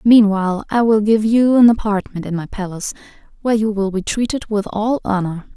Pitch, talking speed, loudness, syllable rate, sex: 210 Hz, 195 wpm, -17 LUFS, 5.6 syllables/s, female